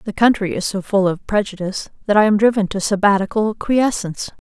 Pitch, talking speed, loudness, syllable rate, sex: 205 Hz, 190 wpm, -18 LUFS, 5.9 syllables/s, female